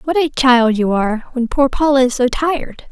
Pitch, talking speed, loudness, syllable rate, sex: 260 Hz, 225 wpm, -15 LUFS, 5.0 syllables/s, female